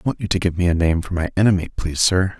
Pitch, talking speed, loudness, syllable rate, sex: 90 Hz, 325 wpm, -19 LUFS, 7.6 syllables/s, male